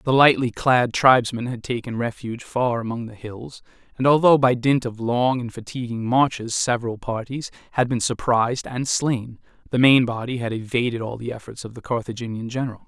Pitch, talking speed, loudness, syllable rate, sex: 120 Hz, 180 wpm, -21 LUFS, 5.4 syllables/s, male